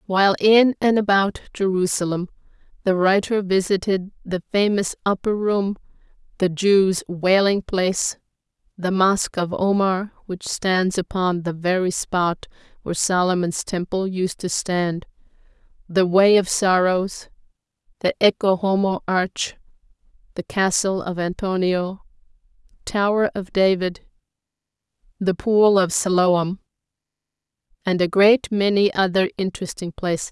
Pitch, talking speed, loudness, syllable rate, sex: 190 Hz, 115 wpm, -20 LUFS, 4.3 syllables/s, female